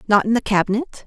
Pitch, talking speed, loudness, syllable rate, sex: 220 Hz, 225 wpm, -19 LUFS, 6.6 syllables/s, female